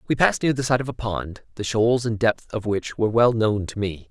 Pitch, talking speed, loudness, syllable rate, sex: 110 Hz, 280 wpm, -22 LUFS, 5.5 syllables/s, male